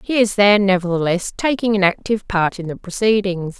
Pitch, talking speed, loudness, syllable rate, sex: 200 Hz, 185 wpm, -17 LUFS, 5.7 syllables/s, female